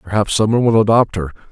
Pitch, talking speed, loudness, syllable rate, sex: 105 Hz, 240 wpm, -15 LUFS, 7.2 syllables/s, male